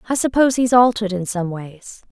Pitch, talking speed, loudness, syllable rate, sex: 215 Hz, 200 wpm, -17 LUFS, 5.9 syllables/s, female